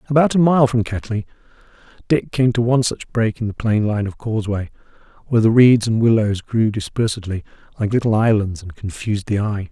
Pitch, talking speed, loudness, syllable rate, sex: 110 Hz, 190 wpm, -18 LUFS, 5.8 syllables/s, male